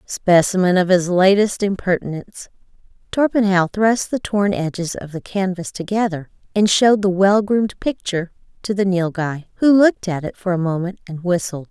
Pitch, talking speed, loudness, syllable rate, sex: 190 Hz, 165 wpm, -18 LUFS, 5.2 syllables/s, female